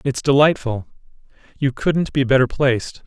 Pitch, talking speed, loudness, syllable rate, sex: 135 Hz, 135 wpm, -18 LUFS, 4.8 syllables/s, male